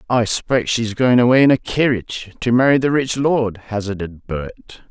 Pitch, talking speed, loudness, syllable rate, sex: 115 Hz, 185 wpm, -17 LUFS, 4.9 syllables/s, male